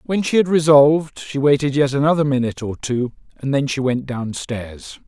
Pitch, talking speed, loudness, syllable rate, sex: 140 Hz, 200 wpm, -18 LUFS, 5.1 syllables/s, male